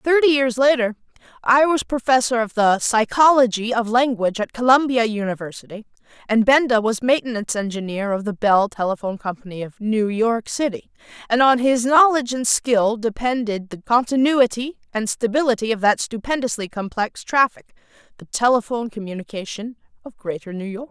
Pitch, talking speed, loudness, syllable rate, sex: 230 Hz, 145 wpm, -19 LUFS, 5.4 syllables/s, female